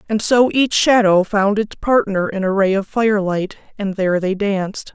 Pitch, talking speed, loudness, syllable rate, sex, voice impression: 205 Hz, 195 wpm, -17 LUFS, 4.8 syllables/s, female, feminine, adult-like, slightly relaxed, slightly hard, muffled, fluent, intellectual, calm, reassuring, modest